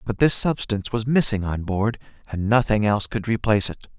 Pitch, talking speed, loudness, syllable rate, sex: 110 Hz, 195 wpm, -22 LUFS, 5.7 syllables/s, male